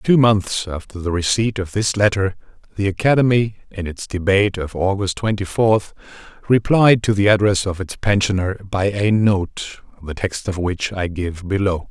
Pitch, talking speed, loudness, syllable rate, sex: 100 Hz, 170 wpm, -19 LUFS, 4.7 syllables/s, male